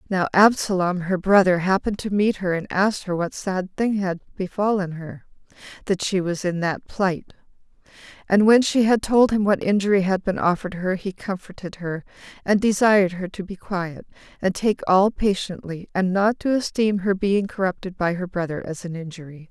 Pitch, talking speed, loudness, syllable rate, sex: 190 Hz, 190 wpm, -22 LUFS, 5.1 syllables/s, female